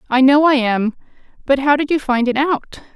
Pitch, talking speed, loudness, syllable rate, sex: 270 Hz, 225 wpm, -16 LUFS, 5.6 syllables/s, female